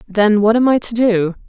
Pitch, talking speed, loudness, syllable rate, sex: 215 Hz, 245 wpm, -14 LUFS, 5.0 syllables/s, female